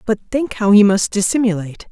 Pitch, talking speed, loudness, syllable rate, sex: 210 Hz, 190 wpm, -15 LUFS, 5.7 syllables/s, female